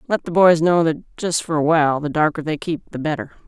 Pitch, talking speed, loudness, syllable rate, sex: 155 Hz, 260 wpm, -19 LUFS, 6.2 syllables/s, female